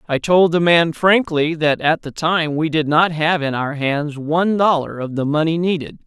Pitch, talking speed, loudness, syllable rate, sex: 160 Hz, 215 wpm, -17 LUFS, 4.6 syllables/s, male